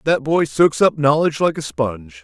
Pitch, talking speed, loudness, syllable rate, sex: 140 Hz, 215 wpm, -17 LUFS, 5.2 syllables/s, male